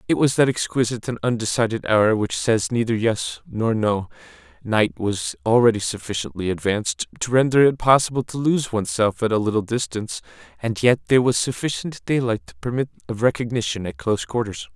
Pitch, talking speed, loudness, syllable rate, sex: 115 Hz, 170 wpm, -21 LUFS, 5.6 syllables/s, male